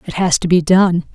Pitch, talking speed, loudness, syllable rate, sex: 180 Hz, 260 wpm, -14 LUFS, 5.2 syllables/s, female